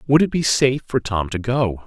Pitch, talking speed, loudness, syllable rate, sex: 125 Hz, 255 wpm, -19 LUFS, 5.4 syllables/s, male